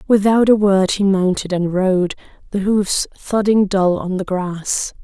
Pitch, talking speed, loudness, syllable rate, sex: 195 Hz, 165 wpm, -17 LUFS, 3.9 syllables/s, female